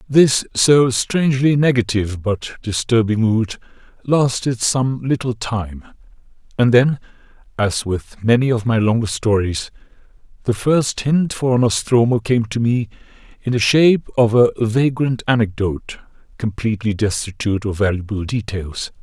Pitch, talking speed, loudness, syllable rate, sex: 115 Hz, 125 wpm, -18 LUFS, 4.5 syllables/s, male